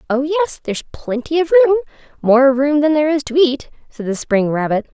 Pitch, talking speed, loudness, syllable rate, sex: 285 Hz, 190 wpm, -16 LUFS, 5.3 syllables/s, female